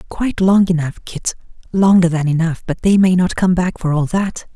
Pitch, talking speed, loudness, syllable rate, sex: 175 Hz, 210 wpm, -16 LUFS, 5.1 syllables/s, male